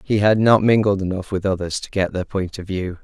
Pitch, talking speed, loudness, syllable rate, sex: 100 Hz, 255 wpm, -19 LUFS, 5.5 syllables/s, male